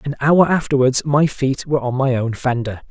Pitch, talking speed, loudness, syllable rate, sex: 135 Hz, 205 wpm, -17 LUFS, 5.2 syllables/s, male